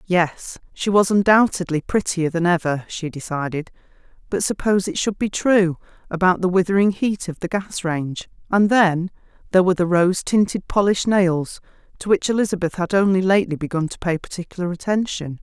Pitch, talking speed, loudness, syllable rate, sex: 180 Hz, 165 wpm, -20 LUFS, 5.5 syllables/s, female